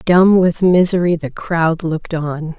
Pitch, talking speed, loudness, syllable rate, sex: 170 Hz, 165 wpm, -15 LUFS, 4.0 syllables/s, female